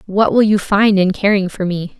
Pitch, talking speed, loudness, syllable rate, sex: 200 Hz, 240 wpm, -14 LUFS, 4.9 syllables/s, female